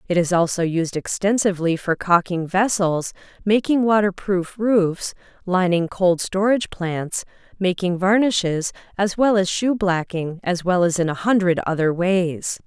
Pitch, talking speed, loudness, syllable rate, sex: 185 Hz, 140 wpm, -20 LUFS, 4.4 syllables/s, female